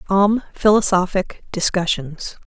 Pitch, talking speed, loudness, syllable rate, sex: 190 Hz, 75 wpm, -18 LUFS, 3.9 syllables/s, female